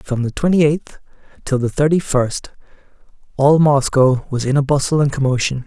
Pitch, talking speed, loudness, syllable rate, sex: 140 Hz, 170 wpm, -16 LUFS, 5.1 syllables/s, male